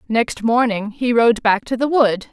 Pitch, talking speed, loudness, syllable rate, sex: 230 Hz, 205 wpm, -17 LUFS, 4.2 syllables/s, female